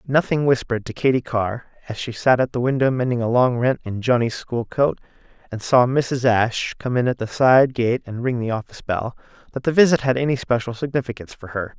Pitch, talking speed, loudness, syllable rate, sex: 125 Hz, 220 wpm, -20 LUFS, 5.7 syllables/s, male